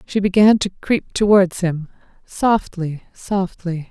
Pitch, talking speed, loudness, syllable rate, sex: 190 Hz, 110 wpm, -18 LUFS, 3.8 syllables/s, female